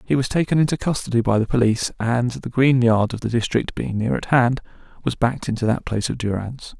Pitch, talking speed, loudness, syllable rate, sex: 120 Hz, 230 wpm, -21 LUFS, 6.1 syllables/s, male